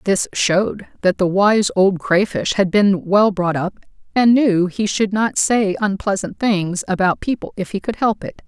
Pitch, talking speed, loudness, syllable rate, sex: 195 Hz, 190 wpm, -17 LUFS, 4.3 syllables/s, female